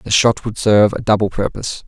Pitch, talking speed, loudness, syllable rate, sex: 105 Hz, 225 wpm, -16 LUFS, 6.0 syllables/s, male